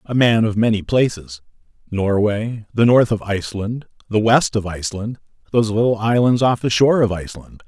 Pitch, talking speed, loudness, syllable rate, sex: 110 Hz, 165 wpm, -18 LUFS, 5.5 syllables/s, male